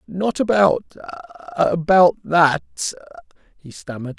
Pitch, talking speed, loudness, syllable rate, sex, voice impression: 150 Hz, 70 wpm, -18 LUFS, 4.0 syllables/s, male, masculine, adult-like, tensed, slightly powerful, soft, intellectual, calm, friendly, reassuring, slightly unique, lively, kind